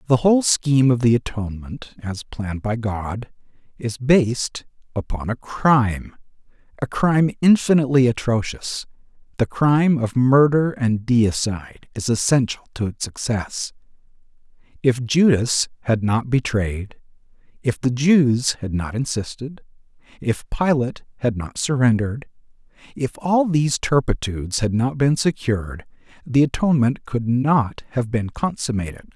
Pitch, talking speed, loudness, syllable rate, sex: 125 Hz, 125 wpm, -20 LUFS, 4.6 syllables/s, male